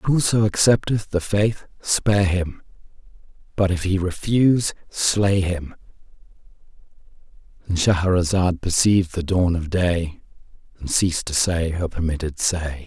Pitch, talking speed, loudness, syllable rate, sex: 90 Hz, 115 wpm, -21 LUFS, 4.3 syllables/s, male